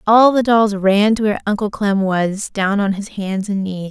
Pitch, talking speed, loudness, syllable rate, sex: 205 Hz, 230 wpm, -16 LUFS, 4.6 syllables/s, female